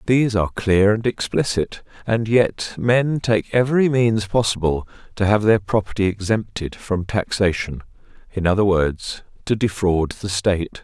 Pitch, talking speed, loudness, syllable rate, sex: 105 Hz, 140 wpm, -20 LUFS, 4.7 syllables/s, male